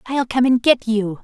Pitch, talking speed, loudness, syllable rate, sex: 240 Hz, 245 wpm, -17 LUFS, 4.5 syllables/s, male